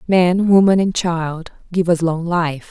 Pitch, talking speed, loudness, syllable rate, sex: 175 Hz, 180 wpm, -16 LUFS, 3.8 syllables/s, female